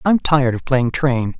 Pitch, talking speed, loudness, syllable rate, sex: 135 Hz, 215 wpm, -17 LUFS, 4.7 syllables/s, male